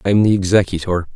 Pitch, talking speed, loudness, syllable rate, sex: 95 Hz, 205 wpm, -16 LUFS, 7.1 syllables/s, male